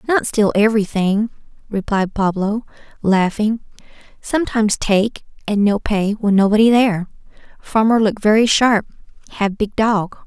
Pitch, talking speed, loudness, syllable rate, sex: 210 Hz, 125 wpm, -17 LUFS, 4.7 syllables/s, female